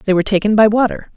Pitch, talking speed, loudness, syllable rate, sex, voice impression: 210 Hz, 260 wpm, -14 LUFS, 7.9 syllables/s, female, feminine, adult-like, slightly fluent, intellectual, elegant, slightly sharp